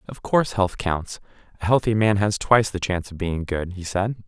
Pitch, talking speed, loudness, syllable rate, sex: 100 Hz, 210 wpm, -22 LUFS, 5.5 syllables/s, male